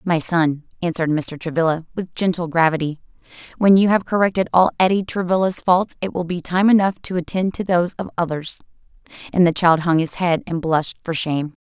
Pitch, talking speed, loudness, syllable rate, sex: 175 Hz, 190 wpm, -19 LUFS, 5.7 syllables/s, female